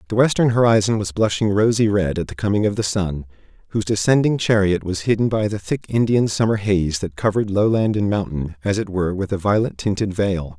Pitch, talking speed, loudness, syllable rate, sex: 100 Hz, 210 wpm, -19 LUFS, 5.8 syllables/s, male